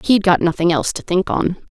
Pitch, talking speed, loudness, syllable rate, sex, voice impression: 185 Hz, 245 wpm, -17 LUFS, 5.8 syllables/s, female, very feminine, slightly young, very adult-like, slightly thin, tensed, slightly powerful, bright, hard, slightly muffled, fluent, slightly raspy, cool, intellectual, slightly refreshing, very sincere, calm, friendly, reassuring, slightly unique, elegant, wild, slightly sweet, slightly lively, strict, intense, slightly sharp, slightly light